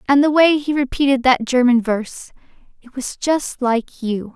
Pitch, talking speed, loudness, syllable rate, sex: 260 Hz, 180 wpm, -17 LUFS, 4.8 syllables/s, female